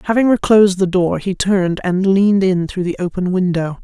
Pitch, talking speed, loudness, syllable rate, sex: 185 Hz, 205 wpm, -15 LUFS, 5.5 syllables/s, female